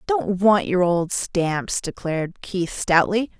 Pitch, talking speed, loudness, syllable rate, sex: 190 Hz, 140 wpm, -21 LUFS, 3.5 syllables/s, female